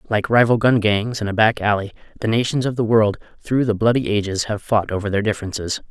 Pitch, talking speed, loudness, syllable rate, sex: 110 Hz, 225 wpm, -19 LUFS, 6.0 syllables/s, male